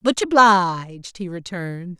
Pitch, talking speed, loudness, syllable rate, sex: 190 Hz, 120 wpm, -16 LUFS, 4.2 syllables/s, female